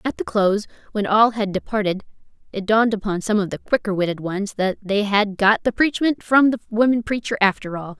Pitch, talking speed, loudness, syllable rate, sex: 210 Hz, 210 wpm, -20 LUFS, 5.5 syllables/s, female